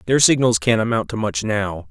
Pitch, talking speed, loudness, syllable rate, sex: 105 Hz, 220 wpm, -18 LUFS, 5.1 syllables/s, male